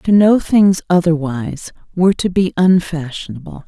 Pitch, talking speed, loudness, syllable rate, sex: 175 Hz, 130 wpm, -14 LUFS, 4.8 syllables/s, female